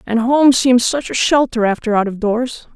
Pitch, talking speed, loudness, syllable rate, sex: 240 Hz, 220 wpm, -15 LUFS, 4.6 syllables/s, female